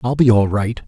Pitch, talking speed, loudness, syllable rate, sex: 115 Hz, 275 wpm, -16 LUFS, 5.3 syllables/s, male